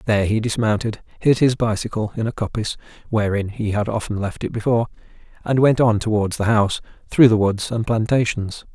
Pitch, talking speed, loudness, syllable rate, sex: 110 Hz, 185 wpm, -20 LUFS, 5.9 syllables/s, male